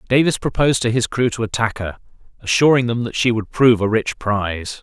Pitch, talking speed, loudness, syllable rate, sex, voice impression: 115 Hz, 210 wpm, -18 LUFS, 5.9 syllables/s, male, very masculine, middle-aged, thick, slightly relaxed, powerful, slightly dark, soft, slightly muffled, fluent, slightly raspy, cool, very intellectual, slightly refreshing, sincere, calm, mature, very friendly, very reassuring, unique, slightly elegant, wild, slightly sweet, lively, kind, slightly modest